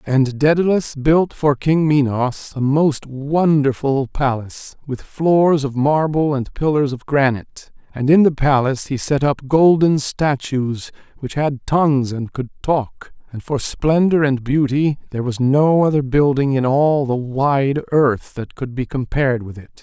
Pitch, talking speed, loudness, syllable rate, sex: 140 Hz, 165 wpm, -17 LUFS, 4.2 syllables/s, male